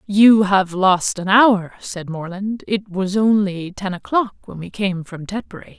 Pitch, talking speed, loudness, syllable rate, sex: 195 Hz, 175 wpm, -18 LUFS, 4.0 syllables/s, female